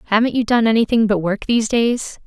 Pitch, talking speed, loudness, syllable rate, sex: 220 Hz, 210 wpm, -17 LUFS, 6.0 syllables/s, female